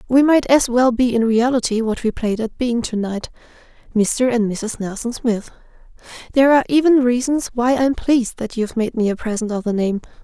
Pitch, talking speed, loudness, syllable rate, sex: 235 Hz, 200 wpm, -18 LUFS, 5.4 syllables/s, female